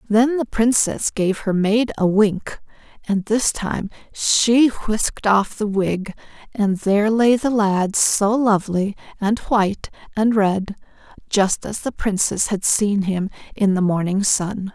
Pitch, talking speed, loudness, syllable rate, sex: 210 Hz, 155 wpm, -19 LUFS, 3.8 syllables/s, female